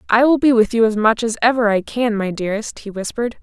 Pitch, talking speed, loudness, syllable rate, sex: 225 Hz, 265 wpm, -17 LUFS, 6.3 syllables/s, female